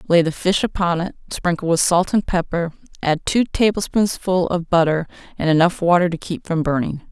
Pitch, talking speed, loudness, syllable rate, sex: 170 Hz, 185 wpm, -19 LUFS, 5.2 syllables/s, female